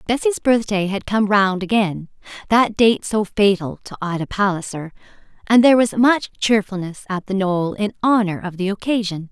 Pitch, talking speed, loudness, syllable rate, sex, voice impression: 205 Hz, 155 wpm, -18 LUFS, 4.9 syllables/s, female, feminine, slightly gender-neutral, adult-like, slightly middle-aged, very thin, tensed, slightly powerful, very bright, very hard, very clear, fluent, slightly cool, slightly intellectual, very refreshing, sincere, friendly, reassuring, very wild, very lively, strict, sharp